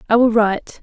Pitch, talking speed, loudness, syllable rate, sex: 220 Hz, 220 wpm, -16 LUFS, 6.2 syllables/s, female